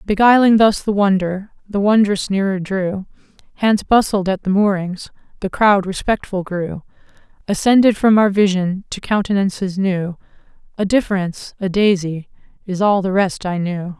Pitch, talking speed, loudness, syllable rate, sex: 195 Hz, 145 wpm, -17 LUFS, 4.7 syllables/s, female